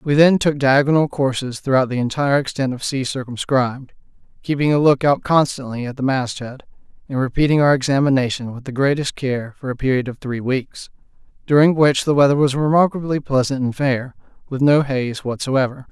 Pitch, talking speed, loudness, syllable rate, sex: 135 Hz, 175 wpm, -18 LUFS, 5.5 syllables/s, male